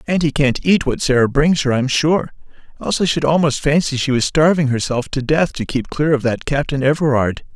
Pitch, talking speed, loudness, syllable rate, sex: 145 Hz, 220 wpm, -17 LUFS, 5.5 syllables/s, male